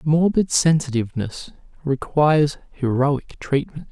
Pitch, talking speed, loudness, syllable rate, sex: 145 Hz, 75 wpm, -20 LUFS, 4.2 syllables/s, male